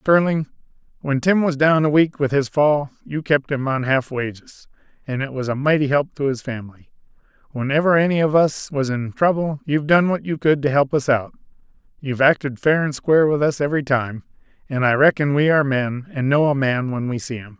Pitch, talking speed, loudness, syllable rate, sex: 140 Hz, 220 wpm, -19 LUFS, 5.5 syllables/s, male